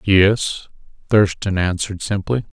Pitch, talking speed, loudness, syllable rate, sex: 100 Hz, 95 wpm, -18 LUFS, 4.0 syllables/s, male